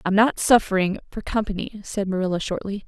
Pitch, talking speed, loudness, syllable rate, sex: 200 Hz, 165 wpm, -23 LUFS, 6.0 syllables/s, female